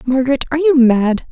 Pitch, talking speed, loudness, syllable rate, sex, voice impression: 265 Hz, 180 wpm, -14 LUFS, 6.2 syllables/s, female, feminine, slightly young, soft, slightly cute, slightly sincere, friendly, slightly kind